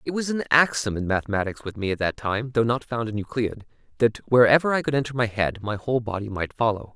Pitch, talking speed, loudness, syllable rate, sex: 115 Hz, 240 wpm, -23 LUFS, 6.1 syllables/s, male